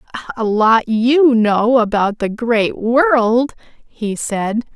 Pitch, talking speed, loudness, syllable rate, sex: 230 Hz, 125 wpm, -15 LUFS, 3.1 syllables/s, female